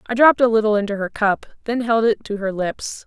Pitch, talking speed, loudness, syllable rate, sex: 220 Hz, 255 wpm, -19 LUFS, 5.7 syllables/s, female